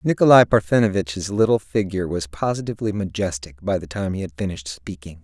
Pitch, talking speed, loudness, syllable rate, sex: 100 Hz, 160 wpm, -21 LUFS, 6.1 syllables/s, male